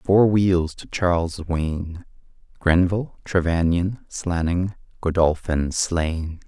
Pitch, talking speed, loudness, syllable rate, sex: 85 Hz, 95 wpm, -22 LUFS, 3.3 syllables/s, male